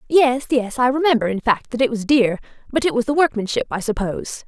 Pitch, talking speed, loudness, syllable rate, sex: 245 Hz, 230 wpm, -19 LUFS, 5.9 syllables/s, female